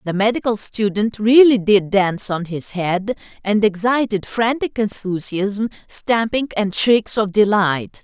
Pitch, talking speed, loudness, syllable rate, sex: 205 Hz, 135 wpm, -18 LUFS, 4.1 syllables/s, female